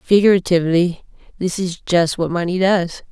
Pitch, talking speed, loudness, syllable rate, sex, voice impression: 175 Hz, 135 wpm, -17 LUFS, 5.0 syllables/s, female, feminine, adult-like, slightly halting, unique